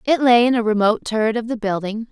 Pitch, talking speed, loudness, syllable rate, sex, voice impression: 225 Hz, 255 wpm, -18 LUFS, 6.7 syllables/s, female, very feminine, slightly young, slightly adult-like, thin, tensed, slightly powerful, bright, very hard, clear, fluent, cute, slightly cool, intellectual, refreshing, slightly sincere, calm, friendly, very reassuring, unique, slightly elegant, wild, sweet, very lively, strict, intense, slightly sharp